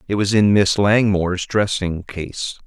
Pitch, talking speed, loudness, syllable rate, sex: 100 Hz, 155 wpm, -18 LUFS, 4.1 syllables/s, male